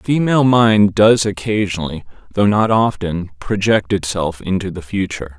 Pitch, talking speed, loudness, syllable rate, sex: 100 Hz, 125 wpm, -16 LUFS, 5.1 syllables/s, male